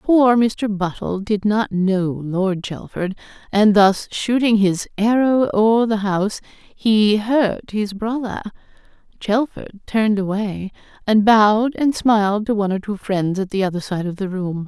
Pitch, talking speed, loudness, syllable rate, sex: 205 Hz, 160 wpm, -18 LUFS, 4.2 syllables/s, female